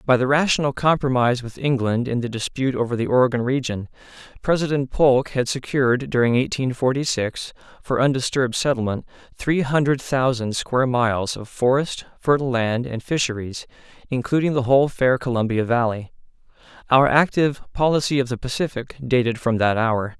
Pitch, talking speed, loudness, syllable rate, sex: 130 Hz, 150 wpm, -21 LUFS, 5.6 syllables/s, male